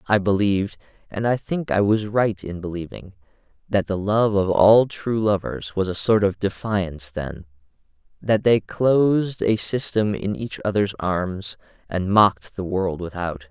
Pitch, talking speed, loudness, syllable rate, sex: 100 Hz, 165 wpm, -21 LUFS, 4.3 syllables/s, male